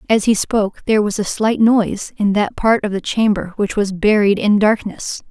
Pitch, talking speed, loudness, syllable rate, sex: 205 Hz, 215 wpm, -16 LUFS, 5.0 syllables/s, female